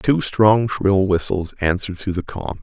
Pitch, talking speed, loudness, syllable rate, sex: 100 Hz, 185 wpm, -19 LUFS, 4.5 syllables/s, male